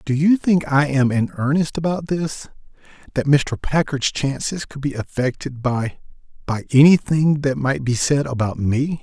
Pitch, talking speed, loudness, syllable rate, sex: 140 Hz, 155 wpm, -19 LUFS, 4.4 syllables/s, male